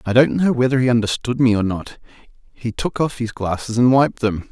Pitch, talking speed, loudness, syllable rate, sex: 120 Hz, 225 wpm, -18 LUFS, 5.4 syllables/s, male